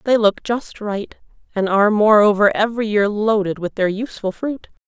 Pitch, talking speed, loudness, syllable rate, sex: 210 Hz, 170 wpm, -18 LUFS, 5.3 syllables/s, female